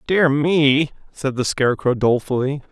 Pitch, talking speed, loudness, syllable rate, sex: 140 Hz, 135 wpm, -19 LUFS, 4.8 syllables/s, male